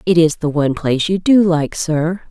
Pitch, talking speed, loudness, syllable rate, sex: 165 Hz, 235 wpm, -15 LUFS, 5.2 syllables/s, female